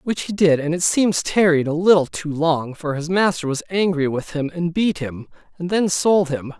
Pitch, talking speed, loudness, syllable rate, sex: 165 Hz, 225 wpm, -19 LUFS, 4.8 syllables/s, male